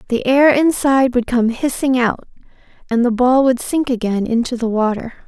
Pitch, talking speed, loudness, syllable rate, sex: 250 Hz, 180 wpm, -16 LUFS, 5.2 syllables/s, female